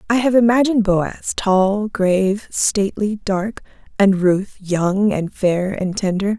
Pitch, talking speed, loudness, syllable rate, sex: 200 Hz, 120 wpm, -18 LUFS, 3.8 syllables/s, female